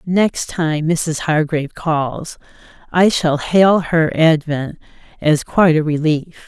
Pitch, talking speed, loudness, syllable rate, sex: 160 Hz, 130 wpm, -16 LUFS, 3.6 syllables/s, female